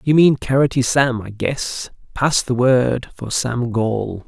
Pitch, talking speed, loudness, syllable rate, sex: 125 Hz, 155 wpm, -18 LUFS, 3.6 syllables/s, male